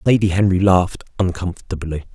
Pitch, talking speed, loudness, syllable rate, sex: 90 Hz, 110 wpm, -19 LUFS, 6.1 syllables/s, male